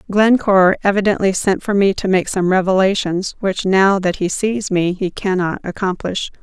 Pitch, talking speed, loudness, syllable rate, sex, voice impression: 190 Hz, 170 wpm, -16 LUFS, 4.9 syllables/s, female, feminine, adult-like, tensed, powerful, bright, clear, fluent, intellectual, friendly, reassuring, lively, kind